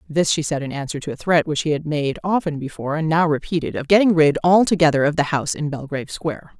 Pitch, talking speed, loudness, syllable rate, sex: 155 Hz, 245 wpm, -20 LUFS, 6.5 syllables/s, female